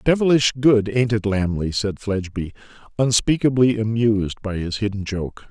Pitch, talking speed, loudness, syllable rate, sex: 110 Hz, 140 wpm, -20 LUFS, 5.0 syllables/s, male